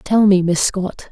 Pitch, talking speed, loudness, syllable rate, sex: 190 Hz, 215 wpm, -16 LUFS, 3.7 syllables/s, female